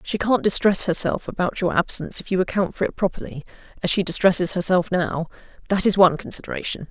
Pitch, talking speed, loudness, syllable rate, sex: 185 Hz, 180 wpm, -20 LUFS, 6.4 syllables/s, female